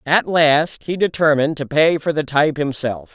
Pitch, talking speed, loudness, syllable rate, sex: 150 Hz, 190 wpm, -17 LUFS, 5.0 syllables/s, male